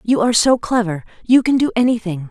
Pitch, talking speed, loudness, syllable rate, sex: 225 Hz, 210 wpm, -16 LUFS, 6.1 syllables/s, female